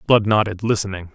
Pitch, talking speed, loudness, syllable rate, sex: 100 Hz, 155 wpm, -19 LUFS, 5.9 syllables/s, male